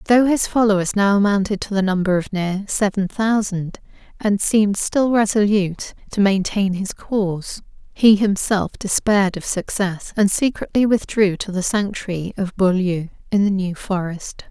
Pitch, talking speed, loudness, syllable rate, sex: 200 Hz, 155 wpm, -19 LUFS, 4.7 syllables/s, female